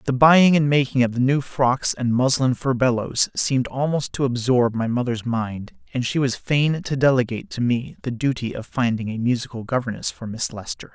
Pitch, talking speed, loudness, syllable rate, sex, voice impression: 125 Hz, 195 wpm, -21 LUFS, 5.1 syllables/s, male, masculine, adult-like, relaxed, fluent, slightly raspy, sincere, calm, reassuring, wild, kind, modest